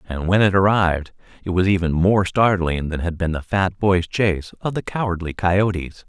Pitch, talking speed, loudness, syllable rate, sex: 90 Hz, 195 wpm, -20 LUFS, 5.1 syllables/s, male